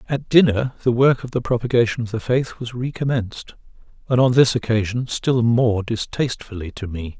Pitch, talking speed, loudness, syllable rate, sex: 120 Hz, 175 wpm, -20 LUFS, 5.3 syllables/s, male